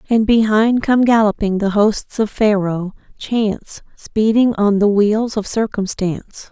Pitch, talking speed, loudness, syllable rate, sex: 210 Hz, 140 wpm, -16 LUFS, 4.0 syllables/s, female